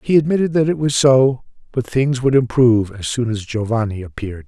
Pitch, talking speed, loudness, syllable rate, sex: 125 Hz, 200 wpm, -17 LUFS, 5.7 syllables/s, male